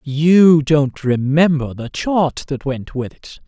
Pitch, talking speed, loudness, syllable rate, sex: 145 Hz, 155 wpm, -16 LUFS, 3.4 syllables/s, male